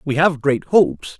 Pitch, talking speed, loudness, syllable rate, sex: 155 Hz, 200 wpm, -17 LUFS, 4.6 syllables/s, male